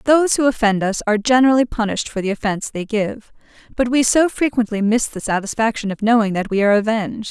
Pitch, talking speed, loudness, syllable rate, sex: 225 Hz, 205 wpm, -18 LUFS, 6.5 syllables/s, female